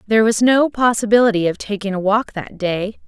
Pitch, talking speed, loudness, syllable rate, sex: 215 Hz, 195 wpm, -17 LUFS, 5.5 syllables/s, female